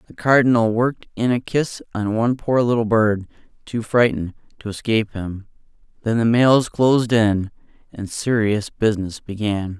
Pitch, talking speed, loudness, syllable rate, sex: 110 Hz, 155 wpm, -19 LUFS, 4.9 syllables/s, male